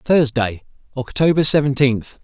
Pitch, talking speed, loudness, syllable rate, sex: 135 Hz, 80 wpm, -17 LUFS, 4.4 syllables/s, male